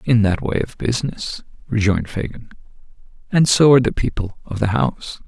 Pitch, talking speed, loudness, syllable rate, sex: 115 Hz, 170 wpm, -19 LUFS, 5.6 syllables/s, male